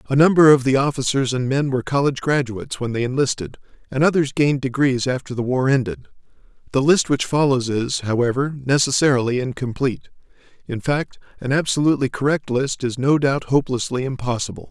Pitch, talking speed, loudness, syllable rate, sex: 135 Hz, 165 wpm, -20 LUFS, 6.0 syllables/s, male